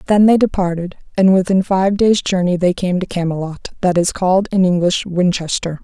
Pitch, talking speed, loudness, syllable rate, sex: 185 Hz, 185 wpm, -16 LUFS, 5.3 syllables/s, female